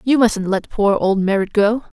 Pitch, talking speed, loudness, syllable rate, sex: 210 Hz, 210 wpm, -17 LUFS, 4.5 syllables/s, female